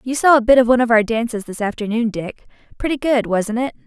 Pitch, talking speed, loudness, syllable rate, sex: 235 Hz, 235 wpm, -17 LUFS, 6.3 syllables/s, female